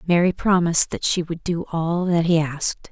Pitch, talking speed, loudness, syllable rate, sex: 170 Hz, 205 wpm, -20 LUFS, 5.2 syllables/s, female